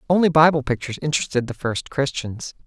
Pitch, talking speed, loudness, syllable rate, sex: 135 Hz, 155 wpm, -21 LUFS, 6.3 syllables/s, male